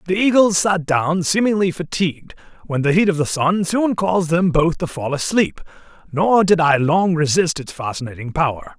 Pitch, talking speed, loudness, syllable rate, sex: 170 Hz, 185 wpm, -18 LUFS, 5.0 syllables/s, male